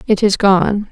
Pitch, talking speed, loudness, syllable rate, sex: 200 Hz, 195 wpm, -13 LUFS, 4.0 syllables/s, female